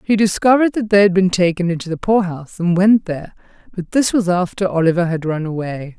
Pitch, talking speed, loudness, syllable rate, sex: 185 Hz, 210 wpm, -16 LUFS, 6.0 syllables/s, female